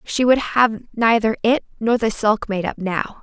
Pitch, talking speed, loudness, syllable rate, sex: 225 Hz, 205 wpm, -19 LUFS, 4.1 syllables/s, female